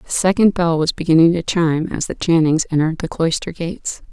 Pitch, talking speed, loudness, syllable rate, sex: 165 Hz, 205 wpm, -17 LUFS, 5.8 syllables/s, female